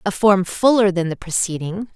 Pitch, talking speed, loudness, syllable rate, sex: 190 Hz, 185 wpm, -18 LUFS, 4.9 syllables/s, female